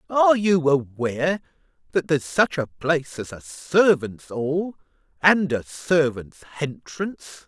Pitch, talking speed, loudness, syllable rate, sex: 155 Hz, 130 wpm, -22 LUFS, 4.2 syllables/s, male